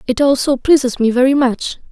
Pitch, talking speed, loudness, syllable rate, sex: 260 Hz, 190 wpm, -14 LUFS, 5.5 syllables/s, female